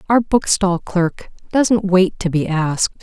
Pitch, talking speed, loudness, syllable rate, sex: 190 Hz, 160 wpm, -17 LUFS, 3.8 syllables/s, female